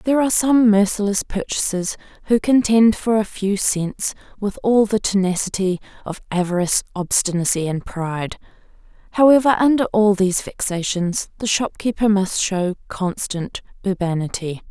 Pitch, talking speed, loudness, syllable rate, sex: 200 Hz, 125 wpm, -19 LUFS, 4.9 syllables/s, female